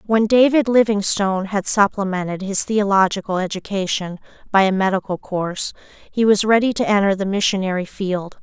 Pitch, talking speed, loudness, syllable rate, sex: 200 Hz, 140 wpm, -18 LUFS, 5.3 syllables/s, female